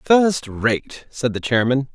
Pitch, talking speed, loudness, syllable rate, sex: 130 Hz, 155 wpm, -20 LUFS, 3.4 syllables/s, male